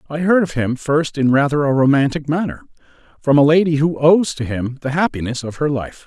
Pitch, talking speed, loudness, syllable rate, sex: 145 Hz, 220 wpm, -17 LUFS, 5.6 syllables/s, male